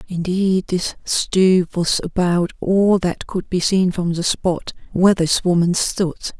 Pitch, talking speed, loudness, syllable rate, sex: 180 Hz, 160 wpm, -18 LUFS, 3.8 syllables/s, female